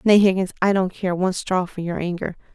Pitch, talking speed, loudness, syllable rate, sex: 185 Hz, 235 wpm, -21 LUFS, 5.9 syllables/s, female